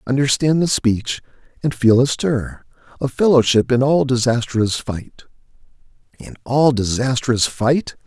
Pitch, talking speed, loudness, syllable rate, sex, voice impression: 125 Hz, 125 wpm, -17 LUFS, 4.1 syllables/s, male, masculine, adult-like, slightly muffled, slightly refreshing, sincere, friendly